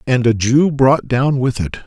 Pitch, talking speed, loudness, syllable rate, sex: 130 Hz, 225 wpm, -15 LUFS, 4.2 syllables/s, male